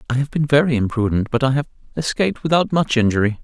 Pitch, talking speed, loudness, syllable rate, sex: 135 Hz, 210 wpm, -19 LUFS, 6.8 syllables/s, male